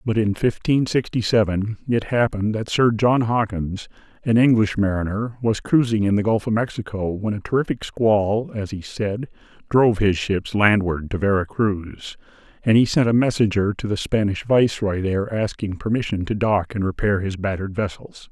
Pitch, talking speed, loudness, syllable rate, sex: 105 Hz, 175 wpm, -21 LUFS, 5.0 syllables/s, male